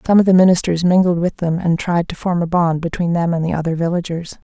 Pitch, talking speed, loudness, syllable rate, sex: 170 Hz, 250 wpm, -17 LUFS, 6.1 syllables/s, female